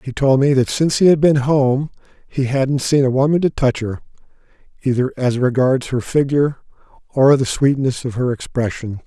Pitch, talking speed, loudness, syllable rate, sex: 135 Hz, 185 wpm, -17 LUFS, 5.2 syllables/s, male